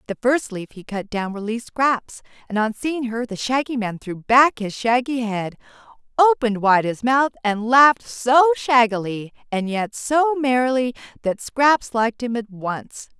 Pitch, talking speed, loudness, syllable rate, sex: 235 Hz, 175 wpm, -20 LUFS, 4.4 syllables/s, female